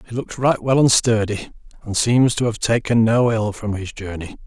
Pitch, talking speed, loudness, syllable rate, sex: 115 Hz, 215 wpm, -19 LUFS, 4.9 syllables/s, male